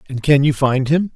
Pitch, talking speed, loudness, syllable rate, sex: 140 Hz, 260 wpm, -16 LUFS, 5.3 syllables/s, male